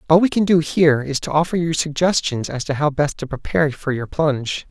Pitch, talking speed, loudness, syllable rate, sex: 150 Hz, 245 wpm, -19 LUFS, 5.8 syllables/s, male